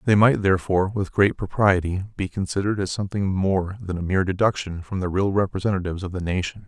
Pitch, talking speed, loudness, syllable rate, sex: 95 Hz, 200 wpm, -23 LUFS, 6.4 syllables/s, male